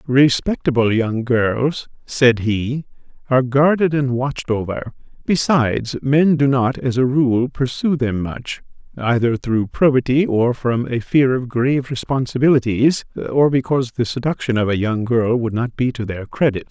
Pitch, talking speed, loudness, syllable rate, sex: 125 Hz, 160 wpm, -18 LUFS, 4.5 syllables/s, male